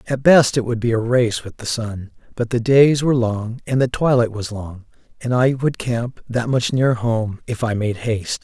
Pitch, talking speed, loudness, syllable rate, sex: 120 Hz, 230 wpm, -19 LUFS, 4.8 syllables/s, male